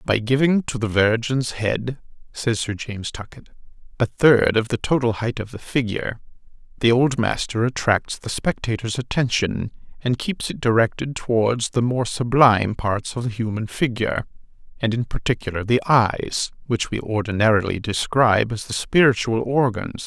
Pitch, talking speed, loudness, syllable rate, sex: 115 Hz, 155 wpm, -21 LUFS, 4.8 syllables/s, male